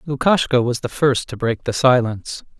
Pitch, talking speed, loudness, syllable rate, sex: 125 Hz, 185 wpm, -18 LUFS, 5.1 syllables/s, male